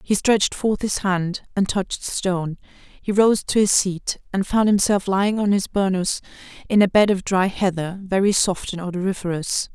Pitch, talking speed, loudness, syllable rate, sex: 190 Hz, 185 wpm, -20 LUFS, 4.9 syllables/s, female